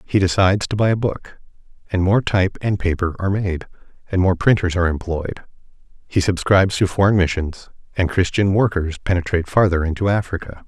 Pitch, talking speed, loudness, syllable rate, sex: 90 Hz, 170 wpm, -19 LUFS, 5.9 syllables/s, male